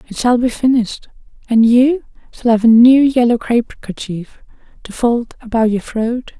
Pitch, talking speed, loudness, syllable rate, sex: 235 Hz, 170 wpm, -14 LUFS, 4.8 syllables/s, female